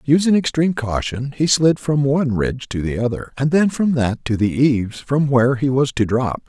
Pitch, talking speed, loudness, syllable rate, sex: 135 Hz, 220 wpm, -18 LUFS, 5.3 syllables/s, male